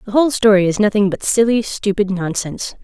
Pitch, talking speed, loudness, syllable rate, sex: 205 Hz, 190 wpm, -16 LUFS, 6.0 syllables/s, female